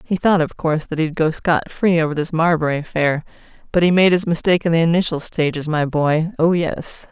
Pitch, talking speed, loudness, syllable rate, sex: 165 Hz, 210 wpm, -18 LUFS, 5.6 syllables/s, female